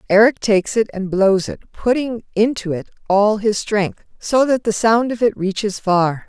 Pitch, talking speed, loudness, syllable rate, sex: 210 Hz, 190 wpm, -17 LUFS, 4.5 syllables/s, female